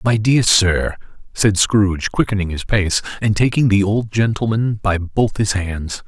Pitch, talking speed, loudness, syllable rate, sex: 100 Hz, 170 wpm, -17 LUFS, 4.3 syllables/s, male